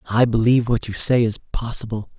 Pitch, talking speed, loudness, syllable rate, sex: 115 Hz, 190 wpm, -20 LUFS, 6.2 syllables/s, male